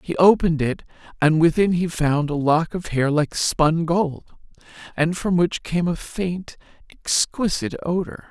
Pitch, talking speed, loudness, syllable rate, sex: 165 Hz, 160 wpm, -21 LUFS, 4.3 syllables/s, female